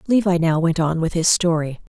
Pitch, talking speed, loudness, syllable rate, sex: 170 Hz, 215 wpm, -19 LUFS, 5.3 syllables/s, female